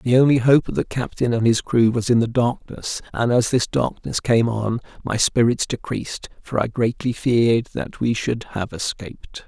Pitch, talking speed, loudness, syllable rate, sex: 120 Hz, 195 wpm, -20 LUFS, 4.7 syllables/s, male